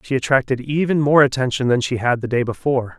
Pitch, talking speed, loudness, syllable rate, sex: 130 Hz, 220 wpm, -18 LUFS, 6.2 syllables/s, male